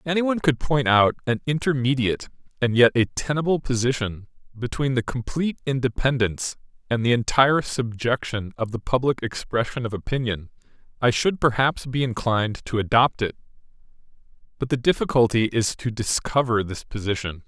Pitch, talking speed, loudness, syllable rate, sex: 125 Hz, 150 wpm, -23 LUFS, 5.6 syllables/s, male